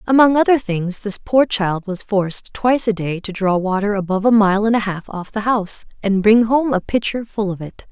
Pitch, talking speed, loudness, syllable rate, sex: 210 Hz, 235 wpm, -17 LUFS, 5.3 syllables/s, female